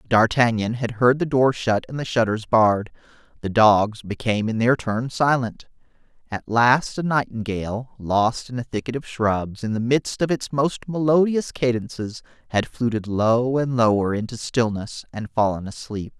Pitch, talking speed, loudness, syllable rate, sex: 120 Hz, 165 wpm, -22 LUFS, 4.6 syllables/s, male